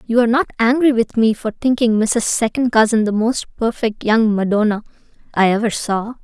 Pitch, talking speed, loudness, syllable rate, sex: 225 Hz, 185 wpm, -17 LUFS, 5.1 syllables/s, female